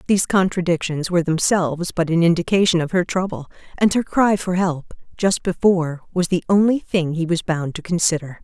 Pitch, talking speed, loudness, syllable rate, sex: 175 Hz, 185 wpm, -19 LUFS, 5.6 syllables/s, female